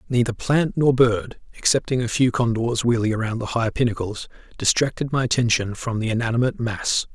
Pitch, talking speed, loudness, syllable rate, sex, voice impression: 120 Hz, 170 wpm, -21 LUFS, 5.7 syllables/s, male, masculine, middle-aged, relaxed, powerful, hard, muffled, raspy, mature, slightly friendly, wild, lively, strict, intense, slightly sharp